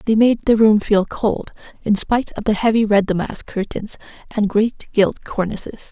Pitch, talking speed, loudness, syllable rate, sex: 210 Hz, 185 wpm, -18 LUFS, 4.7 syllables/s, female